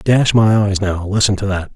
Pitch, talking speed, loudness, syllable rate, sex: 100 Hz, 240 wpm, -15 LUFS, 5.0 syllables/s, male